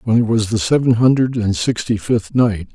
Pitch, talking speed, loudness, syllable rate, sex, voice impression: 110 Hz, 220 wpm, -16 LUFS, 5.0 syllables/s, male, masculine, middle-aged, thick, slightly relaxed, powerful, soft, clear, raspy, cool, intellectual, calm, mature, slightly friendly, reassuring, wild, slightly lively, slightly modest